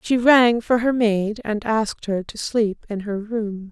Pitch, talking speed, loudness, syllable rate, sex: 220 Hz, 210 wpm, -20 LUFS, 3.9 syllables/s, female